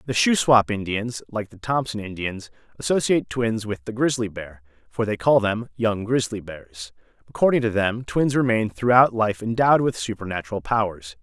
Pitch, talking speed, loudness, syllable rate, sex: 110 Hz, 165 wpm, -22 LUFS, 5.1 syllables/s, male